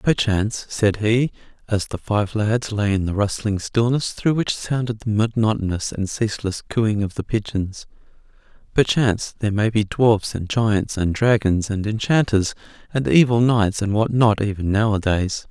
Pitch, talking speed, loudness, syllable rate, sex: 105 Hz, 160 wpm, -20 LUFS, 4.6 syllables/s, male